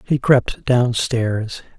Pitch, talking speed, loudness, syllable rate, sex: 120 Hz, 100 wpm, -18 LUFS, 2.7 syllables/s, male